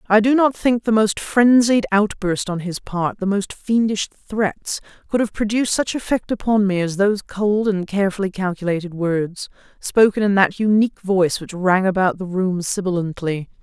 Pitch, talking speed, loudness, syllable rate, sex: 200 Hz, 175 wpm, -19 LUFS, 4.9 syllables/s, female